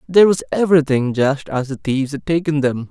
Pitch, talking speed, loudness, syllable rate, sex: 145 Hz, 205 wpm, -17 LUFS, 6.0 syllables/s, male